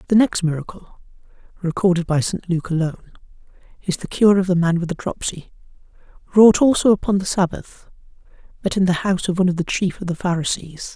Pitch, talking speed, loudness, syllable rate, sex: 180 Hz, 175 wpm, -19 LUFS, 6.1 syllables/s, male